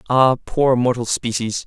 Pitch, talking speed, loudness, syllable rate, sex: 125 Hz, 145 wpm, -18 LUFS, 4.1 syllables/s, male